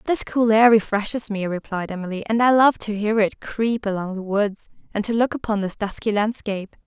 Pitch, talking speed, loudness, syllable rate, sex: 210 Hz, 210 wpm, -21 LUFS, 5.2 syllables/s, female